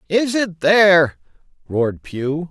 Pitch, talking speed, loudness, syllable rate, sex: 170 Hz, 120 wpm, -17 LUFS, 3.8 syllables/s, male